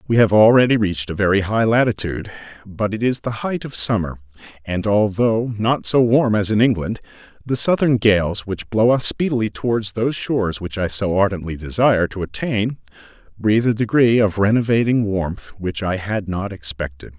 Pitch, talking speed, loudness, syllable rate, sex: 105 Hz, 180 wpm, -19 LUFS, 5.2 syllables/s, male